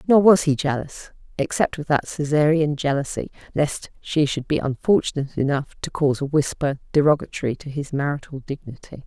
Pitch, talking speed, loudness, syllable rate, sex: 145 Hz, 160 wpm, -22 LUFS, 5.5 syllables/s, female